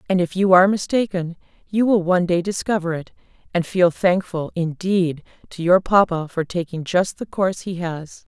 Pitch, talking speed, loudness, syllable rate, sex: 180 Hz, 180 wpm, -20 LUFS, 5.1 syllables/s, female